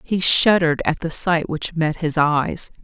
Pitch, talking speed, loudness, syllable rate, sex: 160 Hz, 190 wpm, -18 LUFS, 4.2 syllables/s, female